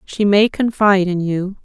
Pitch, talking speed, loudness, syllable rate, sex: 195 Hz, 185 wpm, -16 LUFS, 4.7 syllables/s, female